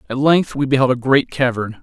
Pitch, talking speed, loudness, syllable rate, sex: 130 Hz, 230 wpm, -16 LUFS, 5.5 syllables/s, male